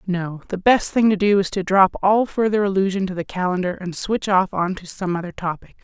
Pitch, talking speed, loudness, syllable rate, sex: 190 Hz, 235 wpm, -20 LUFS, 5.5 syllables/s, female